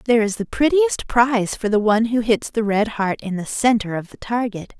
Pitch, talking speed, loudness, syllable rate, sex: 225 Hz, 240 wpm, -20 LUFS, 5.5 syllables/s, female